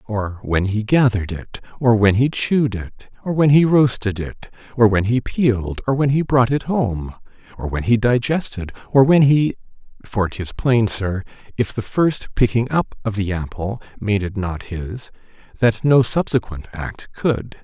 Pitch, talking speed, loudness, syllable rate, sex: 115 Hz, 170 wpm, -19 LUFS, 4.4 syllables/s, male